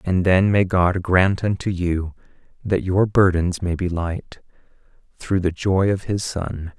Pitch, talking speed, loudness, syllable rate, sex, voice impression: 90 Hz, 170 wpm, -20 LUFS, 3.8 syllables/s, male, very masculine, adult-like, slightly dark, sincere, very calm